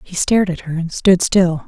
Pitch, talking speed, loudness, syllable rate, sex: 175 Hz, 250 wpm, -16 LUFS, 5.1 syllables/s, female